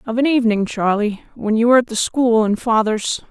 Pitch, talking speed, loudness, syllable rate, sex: 225 Hz, 220 wpm, -17 LUFS, 5.7 syllables/s, female